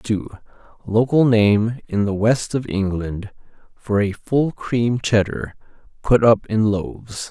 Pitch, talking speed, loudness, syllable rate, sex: 110 Hz, 140 wpm, -19 LUFS, 3.6 syllables/s, male